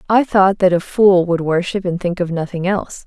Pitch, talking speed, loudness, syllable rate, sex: 185 Hz, 235 wpm, -16 LUFS, 5.2 syllables/s, female